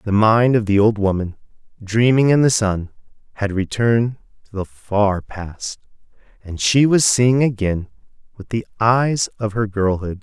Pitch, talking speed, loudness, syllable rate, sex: 110 Hz, 160 wpm, -18 LUFS, 4.3 syllables/s, male